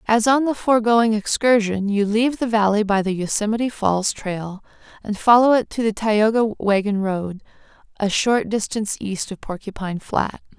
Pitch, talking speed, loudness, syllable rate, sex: 215 Hz, 165 wpm, -20 LUFS, 4.9 syllables/s, female